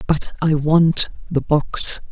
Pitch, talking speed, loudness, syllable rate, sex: 155 Hz, 140 wpm, -17 LUFS, 3.1 syllables/s, female